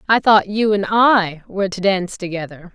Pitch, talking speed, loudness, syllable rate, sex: 195 Hz, 195 wpm, -17 LUFS, 5.3 syllables/s, female